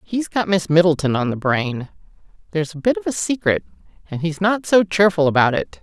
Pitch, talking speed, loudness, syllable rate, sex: 175 Hz, 205 wpm, -19 LUFS, 5.6 syllables/s, female